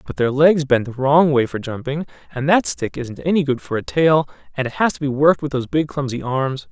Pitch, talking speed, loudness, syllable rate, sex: 135 Hz, 260 wpm, -19 LUFS, 5.6 syllables/s, male